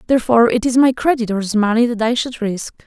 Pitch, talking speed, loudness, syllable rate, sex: 230 Hz, 210 wpm, -16 LUFS, 6.3 syllables/s, female